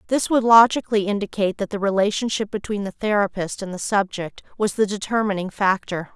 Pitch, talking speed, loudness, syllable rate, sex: 205 Hz, 165 wpm, -21 LUFS, 5.9 syllables/s, female